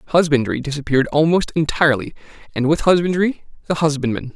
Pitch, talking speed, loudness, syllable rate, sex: 150 Hz, 125 wpm, -18 LUFS, 6.6 syllables/s, male